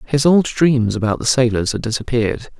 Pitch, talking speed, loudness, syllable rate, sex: 125 Hz, 185 wpm, -17 LUFS, 5.3 syllables/s, male